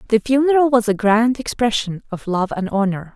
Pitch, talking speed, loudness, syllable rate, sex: 225 Hz, 190 wpm, -18 LUFS, 5.3 syllables/s, female